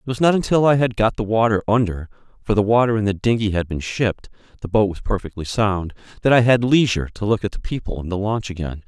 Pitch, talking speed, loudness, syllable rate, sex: 105 Hz, 250 wpm, -19 LUFS, 4.9 syllables/s, male